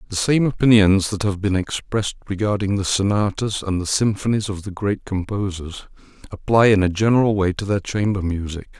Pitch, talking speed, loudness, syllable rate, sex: 100 Hz, 175 wpm, -20 LUFS, 5.4 syllables/s, male